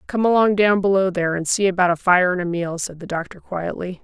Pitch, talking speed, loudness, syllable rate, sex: 185 Hz, 255 wpm, -19 LUFS, 5.9 syllables/s, female